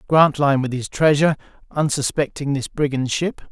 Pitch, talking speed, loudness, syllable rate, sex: 145 Hz, 135 wpm, -20 LUFS, 5.5 syllables/s, male